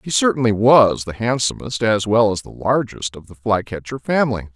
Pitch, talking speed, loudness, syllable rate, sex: 110 Hz, 185 wpm, -18 LUFS, 5.2 syllables/s, male